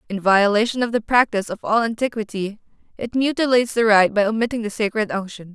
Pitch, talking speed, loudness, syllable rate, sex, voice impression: 220 Hz, 185 wpm, -19 LUFS, 6.2 syllables/s, female, feminine, adult-like, tensed, clear, slightly cool, intellectual, refreshing, lively